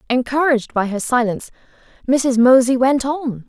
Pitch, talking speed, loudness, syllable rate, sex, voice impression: 255 Hz, 140 wpm, -16 LUFS, 5.1 syllables/s, female, feminine, slightly adult-like, clear, slightly cute, slightly refreshing, friendly, slightly lively